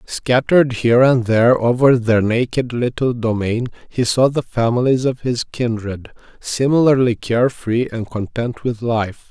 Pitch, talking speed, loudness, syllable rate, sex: 120 Hz, 150 wpm, -17 LUFS, 4.4 syllables/s, male